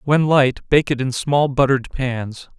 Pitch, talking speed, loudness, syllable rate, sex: 135 Hz, 185 wpm, -18 LUFS, 4.5 syllables/s, male